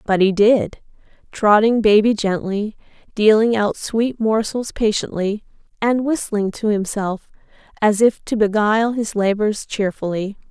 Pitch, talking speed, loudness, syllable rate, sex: 215 Hz, 125 wpm, -18 LUFS, 4.2 syllables/s, female